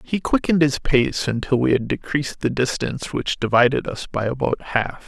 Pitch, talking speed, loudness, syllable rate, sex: 135 Hz, 190 wpm, -21 LUFS, 5.2 syllables/s, male